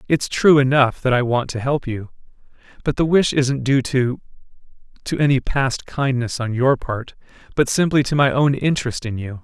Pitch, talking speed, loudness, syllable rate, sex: 130 Hz, 185 wpm, -19 LUFS, 4.9 syllables/s, male